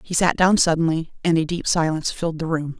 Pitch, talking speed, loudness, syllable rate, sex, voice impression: 165 Hz, 235 wpm, -20 LUFS, 6.2 syllables/s, female, very feminine, adult-like, slightly middle-aged, thin, slightly tensed, powerful, bright, hard, clear, fluent, raspy, slightly cool, intellectual, very refreshing, slightly sincere, slightly calm, slightly friendly, slightly reassuring, unique, slightly elegant, wild, slightly sweet, lively, strict, slightly intense, sharp, slightly light